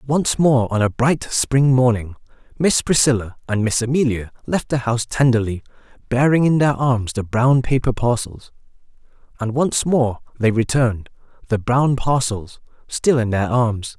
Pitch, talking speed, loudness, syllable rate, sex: 125 Hz, 150 wpm, -18 LUFS, 4.5 syllables/s, male